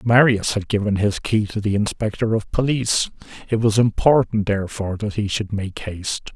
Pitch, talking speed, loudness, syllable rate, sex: 105 Hz, 180 wpm, -20 LUFS, 5.4 syllables/s, male